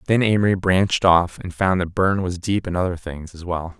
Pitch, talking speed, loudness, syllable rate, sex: 90 Hz, 235 wpm, -20 LUFS, 5.5 syllables/s, male